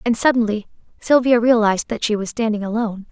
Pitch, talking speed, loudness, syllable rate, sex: 225 Hz, 175 wpm, -18 LUFS, 6.3 syllables/s, female